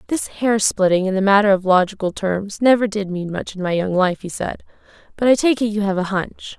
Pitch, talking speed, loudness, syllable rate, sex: 200 Hz, 245 wpm, -18 LUFS, 5.4 syllables/s, female